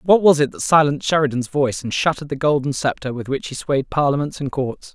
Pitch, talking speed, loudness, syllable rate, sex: 145 Hz, 230 wpm, -19 LUFS, 6.2 syllables/s, male